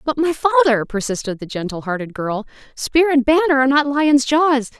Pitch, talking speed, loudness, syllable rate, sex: 255 Hz, 190 wpm, -17 LUFS, 5.2 syllables/s, female